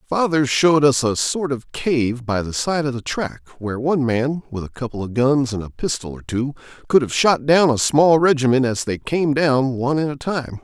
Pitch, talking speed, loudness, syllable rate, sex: 135 Hz, 230 wpm, -19 LUFS, 5.1 syllables/s, male